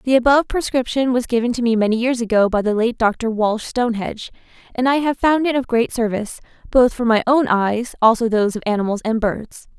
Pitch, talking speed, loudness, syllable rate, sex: 235 Hz, 215 wpm, -18 LUFS, 5.7 syllables/s, female